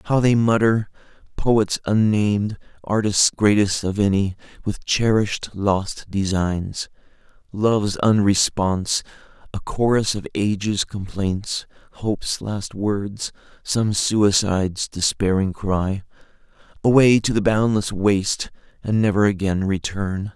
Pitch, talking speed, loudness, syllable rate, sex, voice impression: 100 Hz, 95 wpm, -21 LUFS, 3.9 syllables/s, male, masculine, adult-like, slightly thick, slightly dark, cool, slightly calm